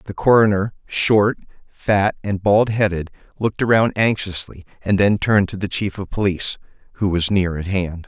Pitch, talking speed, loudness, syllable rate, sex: 100 Hz, 170 wpm, -19 LUFS, 5.1 syllables/s, male